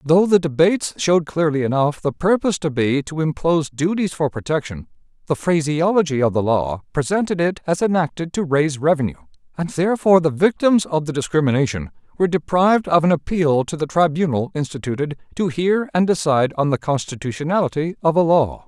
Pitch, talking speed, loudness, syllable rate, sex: 155 Hz, 170 wpm, -19 LUFS, 5.9 syllables/s, male